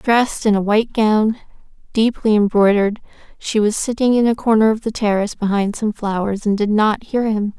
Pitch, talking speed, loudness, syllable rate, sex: 215 Hz, 190 wpm, -17 LUFS, 5.4 syllables/s, female